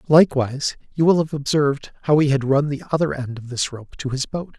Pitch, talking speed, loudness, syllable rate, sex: 140 Hz, 235 wpm, -21 LUFS, 5.9 syllables/s, male